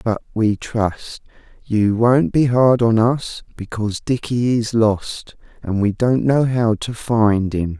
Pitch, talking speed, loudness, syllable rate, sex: 115 Hz, 160 wpm, -18 LUFS, 3.6 syllables/s, male